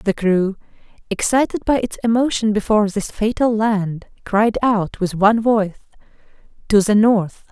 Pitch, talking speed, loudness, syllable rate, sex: 210 Hz, 145 wpm, -18 LUFS, 4.7 syllables/s, female